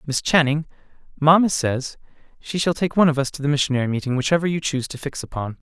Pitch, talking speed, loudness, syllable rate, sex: 145 Hz, 210 wpm, -21 LUFS, 6.9 syllables/s, male